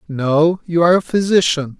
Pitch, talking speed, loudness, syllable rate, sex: 165 Hz, 165 wpm, -15 LUFS, 5.0 syllables/s, male